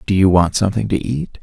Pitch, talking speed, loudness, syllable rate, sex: 95 Hz, 255 wpm, -16 LUFS, 6.1 syllables/s, male